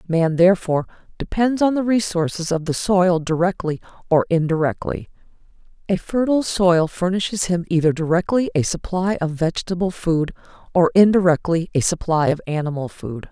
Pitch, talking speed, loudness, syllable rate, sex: 175 Hz, 140 wpm, -19 LUFS, 5.3 syllables/s, female